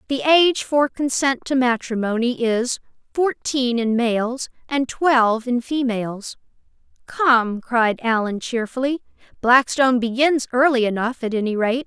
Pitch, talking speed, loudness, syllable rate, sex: 250 Hz, 125 wpm, -20 LUFS, 4.3 syllables/s, female